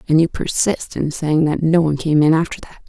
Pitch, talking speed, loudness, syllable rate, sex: 155 Hz, 250 wpm, -17 LUFS, 5.6 syllables/s, female